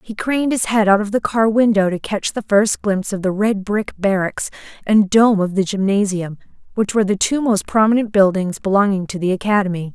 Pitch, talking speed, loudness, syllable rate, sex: 205 Hz, 210 wpm, -17 LUFS, 5.5 syllables/s, female